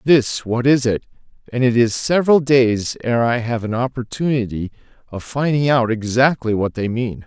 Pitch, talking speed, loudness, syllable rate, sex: 120 Hz, 175 wpm, -18 LUFS, 4.6 syllables/s, male